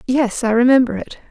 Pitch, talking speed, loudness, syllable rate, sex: 240 Hz, 185 wpm, -16 LUFS, 5.7 syllables/s, female